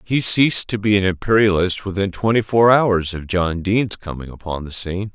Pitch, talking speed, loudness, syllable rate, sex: 100 Hz, 200 wpm, -18 LUFS, 5.4 syllables/s, male